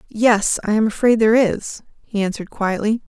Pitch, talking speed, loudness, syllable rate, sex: 215 Hz, 170 wpm, -18 LUFS, 5.3 syllables/s, female